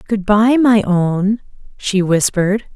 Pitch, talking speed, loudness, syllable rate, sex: 205 Hz, 130 wpm, -15 LUFS, 3.7 syllables/s, female